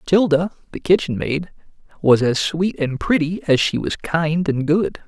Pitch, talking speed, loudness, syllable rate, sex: 160 Hz, 175 wpm, -19 LUFS, 4.3 syllables/s, male